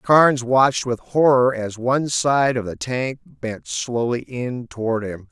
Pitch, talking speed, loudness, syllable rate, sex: 125 Hz, 170 wpm, -20 LUFS, 4.0 syllables/s, male